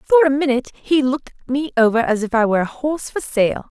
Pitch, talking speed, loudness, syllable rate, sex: 260 Hz, 235 wpm, -18 LUFS, 6.5 syllables/s, female